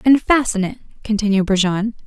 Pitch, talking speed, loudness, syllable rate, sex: 215 Hz, 145 wpm, -18 LUFS, 5.6 syllables/s, female